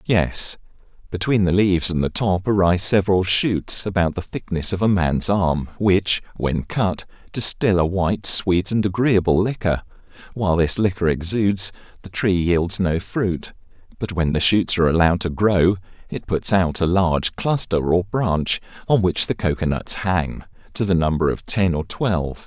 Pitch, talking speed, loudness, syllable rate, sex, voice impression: 90 Hz, 175 wpm, -20 LUFS, 4.7 syllables/s, male, masculine, adult-like, thick, slightly powerful, muffled, slightly intellectual, sincere, calm, mature, slightly friendly, unique, wild, lively, slightly sharp